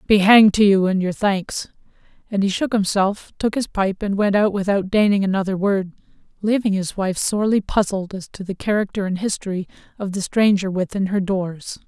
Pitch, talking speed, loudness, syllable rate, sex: 195 Hz, 190 wpm, -19 LUFS, 5.3 syllables/s, female